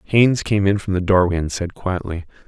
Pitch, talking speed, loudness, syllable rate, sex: 95 Hz, 220 wpm, -19 LUFS, 5.5 syllables/s, male